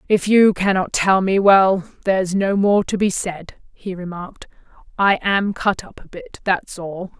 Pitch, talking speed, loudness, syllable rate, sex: 190 Hz, 185 wpm, -18 LUFS, 4.2 syllables/s, female